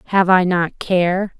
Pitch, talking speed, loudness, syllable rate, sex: 180 Hz, 170 wpm, -16 LUFS, 3.6 syllables/s, female